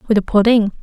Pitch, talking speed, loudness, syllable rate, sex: 215 Hz, 215 wpm, -14 LUFS, 6.9 syllables/s, female